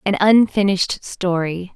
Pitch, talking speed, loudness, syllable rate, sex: 190 Hz, 105 wpm, -18 LUFS, 4.4 syllables/s, female